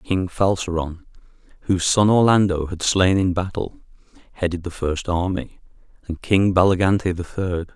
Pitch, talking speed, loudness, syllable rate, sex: 90 Hz, 140 wpm, -20 LUFS, 5.0 syllables/s, male